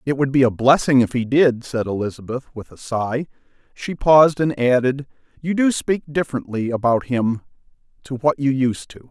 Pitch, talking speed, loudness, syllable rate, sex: 130 Hz, 185 wpm, -19 LUFS, 5.1 syllables/s, male